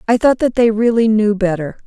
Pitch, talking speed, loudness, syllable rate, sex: 220 Hz, 225 wpm, -14 LUFS, 5.5 syllables/s, female